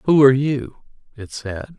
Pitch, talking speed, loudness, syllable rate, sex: 125 Hz, 170 wpm, -18 LUFS, 4.6 syllables/s, male